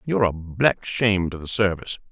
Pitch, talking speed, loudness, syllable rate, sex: 100 Hz, 200 wpm, -22 LUFS, 5.7 syllables/s, male